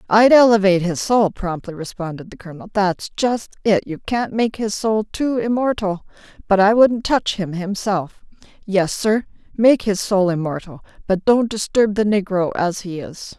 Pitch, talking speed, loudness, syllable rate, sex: 200 Hz, 170 wpm, -18 LUFS, 4.6 syllables/s, female